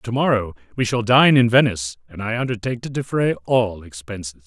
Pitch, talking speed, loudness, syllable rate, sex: 110 Hz, 190 wpm, -19 LUFS, 5.6 syllables/s, male